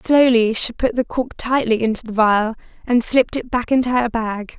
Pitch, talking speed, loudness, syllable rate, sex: 235 Hz, 210 wpm, -18 LUFS, 5.0 syllables/s, female